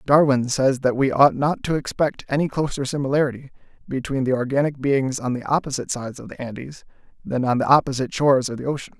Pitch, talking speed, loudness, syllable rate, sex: 135 Hz, 200 wpm, -21 LUFS, 6.3 syllables/s, male